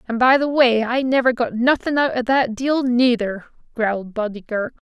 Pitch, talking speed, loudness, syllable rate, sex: 240 Hz, 195 wpm, -19 LUFS, 5.0 syllables/s, female